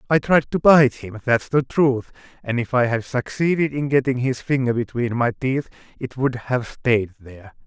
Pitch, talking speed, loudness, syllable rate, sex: 130 Hz, 195 wpm, -20 LUFS, 4.7 syllables/s, male